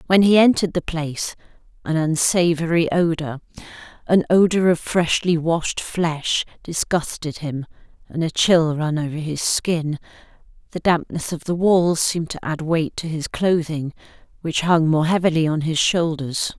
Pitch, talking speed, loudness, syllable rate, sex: 165 Hz, 150 wpm, -20 LUFS, 4.5 syllables/s, female